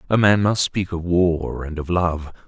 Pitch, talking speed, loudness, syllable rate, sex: 90 Hz, 220 wpm, -20 LUFS, 4.2 syllables/s, male